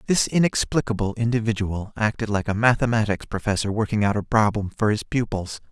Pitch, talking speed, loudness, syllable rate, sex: 110 Hz, 155 wpm, -23 LUFS, 5.7 syllables/s, male